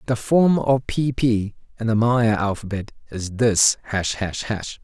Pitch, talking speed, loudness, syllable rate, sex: 110 Hz, 175 wpm, -21 LUFS, 3.9 syllables/s, male